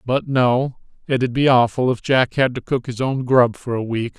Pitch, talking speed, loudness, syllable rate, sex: 125 Hz, 215 wpm, -19 LUFS, 4.5 syllables/s, male